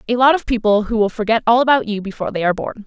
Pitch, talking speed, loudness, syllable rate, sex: 225 Hz, 295 wpm, -17 LUFS, 7.5 syllables/s, female